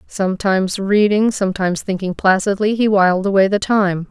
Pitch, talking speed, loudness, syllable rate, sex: 195 Hz, 145 wpm, -16 LUFS, 5.5 syllables/s, female